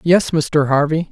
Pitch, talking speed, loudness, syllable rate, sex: 155 Hz, 160 wpm, -16 LUFS, 4.0 syllables/s, male